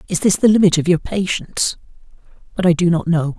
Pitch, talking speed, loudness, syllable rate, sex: 175 Hz, 215 wpm, -16 LUFS, 6.1 syllables/s, male